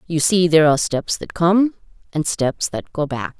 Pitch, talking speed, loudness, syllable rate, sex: 165 Hz, 210 wpm, -18 LUFS, 4.9 syllables/s, female